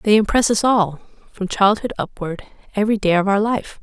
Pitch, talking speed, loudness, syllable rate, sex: 205 Hz, 175 wpm, -19 LUFS, 5.7 syllables/s, female